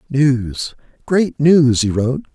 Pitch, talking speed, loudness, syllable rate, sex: 135 Hz, 130 wpm, -16 LUFS, 3.4 syllables/s, male